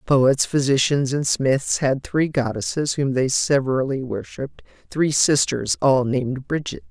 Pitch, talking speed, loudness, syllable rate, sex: 135 Hz, 140 wpm, -20 LUFS, 4.3 syllables/s, female